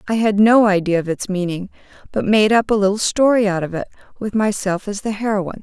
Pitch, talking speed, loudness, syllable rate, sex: 205 Hz, 225 wpm, -17 LUFS, 5.9 syllables/s, female